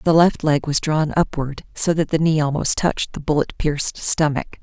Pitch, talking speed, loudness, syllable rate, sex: 155 Hz, 210 wpm, -20 LUFS, 5.2 syllables/s, female